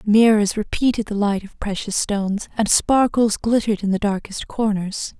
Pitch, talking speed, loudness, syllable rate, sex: 210 Hz, 160 wpm, -20 LUFS, 4.8 syllables/s, female